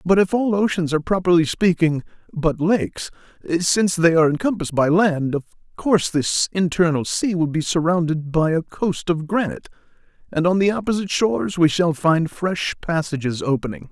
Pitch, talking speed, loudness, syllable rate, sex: 170 Hz, 170 wpm, -20 LUFS, 5.5 syllables/s, male